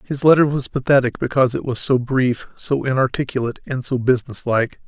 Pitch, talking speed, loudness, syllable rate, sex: 130 Hz, 185 wpm, -19 LUFS, 5.9 syllables/s, male